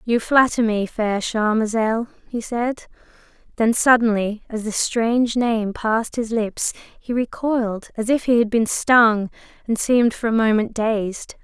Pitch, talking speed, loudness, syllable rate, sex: 225 Hz, 155 wpm, -20 LUFS, 4.2 syllables/s, female